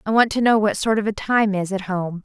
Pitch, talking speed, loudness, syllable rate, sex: 205 Hz, 320 wpm, -20 LUFS, 5.7 syllables/s, female